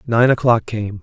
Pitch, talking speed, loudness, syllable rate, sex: 115 Hz, 175 wpm, -16 LUFS, 4.5 syllables/s, male